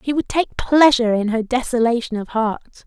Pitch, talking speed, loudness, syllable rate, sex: 240 Hz, 190 wpm, -18 LUFS, 5.5 syllables/s, female